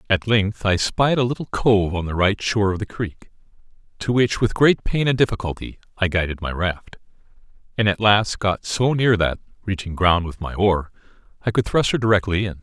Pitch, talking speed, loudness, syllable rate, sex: 100 Hz, 205 wpm, -20 LUFS, 5.2 syllables/s, male